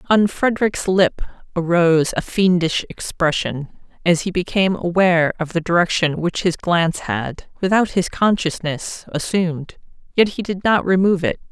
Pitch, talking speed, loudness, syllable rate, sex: 175 Hz, 145 wpm, -19 LUFS, 4.9 syllables/s, female